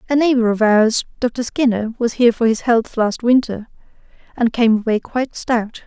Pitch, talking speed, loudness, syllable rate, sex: 230 Hz, 185 wpm, -17 LUFS, 5.0 syllables/s, female